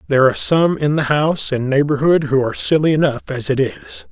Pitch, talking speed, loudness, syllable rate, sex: 145 Hz, 220 wpm, -16 LUFS, 5.9 syllables/s, male